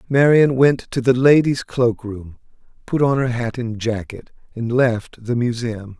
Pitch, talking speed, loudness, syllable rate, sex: 120 Hz, 170 wpm, -18 LUFS, 4.1 syllables/s, male